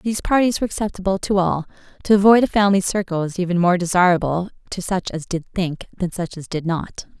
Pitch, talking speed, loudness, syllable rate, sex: 185 Hz, 210 wpm, -20 LUFS, 6.3 syllables/s, female